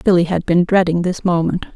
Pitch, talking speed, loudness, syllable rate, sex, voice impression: 175 Hz, 205 wpm, -16 LUFS, 5.5 syllables/s, female, very feminine, middle-aged, very thin, slightly tensed, weak, dark, soft, clear, fluent, slightly raspy, slightly cool, very intellectual, refreshing, sincere, very calm, very friendly, very reassuring, very unique, very elegant, slightly wild, sweet, slightly lively, very kind, modest, slightly light